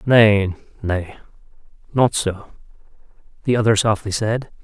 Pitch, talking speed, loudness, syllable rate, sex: 105 Hz, 105 wpm, -19 LUFS, 4.3 syllables/s, male